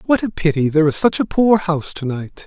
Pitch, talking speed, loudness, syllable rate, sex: 170 Hz, 245 wpm, -17 LUFS, 6.0 syllables/s, male